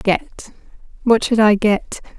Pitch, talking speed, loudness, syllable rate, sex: 220 Hz, 110 wpm, -16 LUFS, 3.5 syllables/s, female